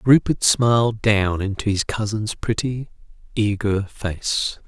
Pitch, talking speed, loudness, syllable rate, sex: 105 Hz, 115 wpm, -21 LUFS, 3.7 syllables/s, male